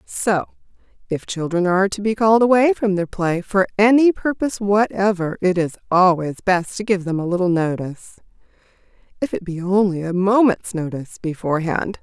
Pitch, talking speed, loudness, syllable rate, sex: 190 Hz, 165 wpm, -19 LUFS, 5.5 syllables/s, female